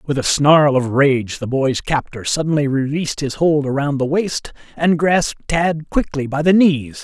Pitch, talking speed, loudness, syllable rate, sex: 145 Hz, 190 wpm, -17 LUFS, 4.4 syllables/s, male